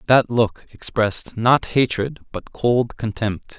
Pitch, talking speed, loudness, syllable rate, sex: 115 Hz, 135 wpm, -20 LUFS, 3.7 syllables/s, male